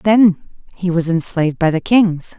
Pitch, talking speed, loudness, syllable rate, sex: 180 Hz, 175 wpm, -15 LUFS, 4.3 syllables/s, female